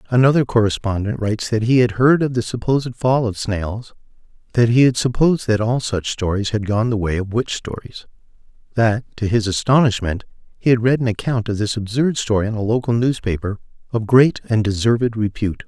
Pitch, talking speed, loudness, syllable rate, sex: 115 Hz, 190 wpm, -18 LUFS, 5.6 syllables/s, male